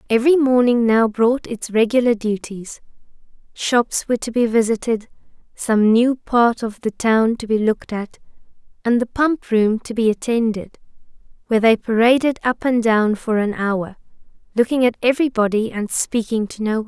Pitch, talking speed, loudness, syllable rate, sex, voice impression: 230 Hz, 160 wpm, -18 LUFS, 5.0 syllables/s, female, feminine, slightly young, tensed, slightly powerful, bright, slightly soft, clear, slightly halting, slightly nasal, cute, calm, friendly, reassuring, slightly elegant, lively, kind